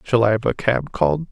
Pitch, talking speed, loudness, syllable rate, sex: 115 Hz, 275 wpm, -20 LUFS, 6.0 syllables/s, male